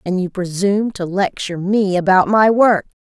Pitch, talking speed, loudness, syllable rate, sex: 195 Hz, 180 wpm, -16 LUFS, 5.0 syllables/s, female